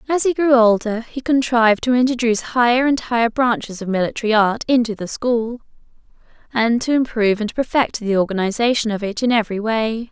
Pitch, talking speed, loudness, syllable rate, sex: 230 Hz, 180 wpm, -18 LUFS, 5.8 syllables/s, female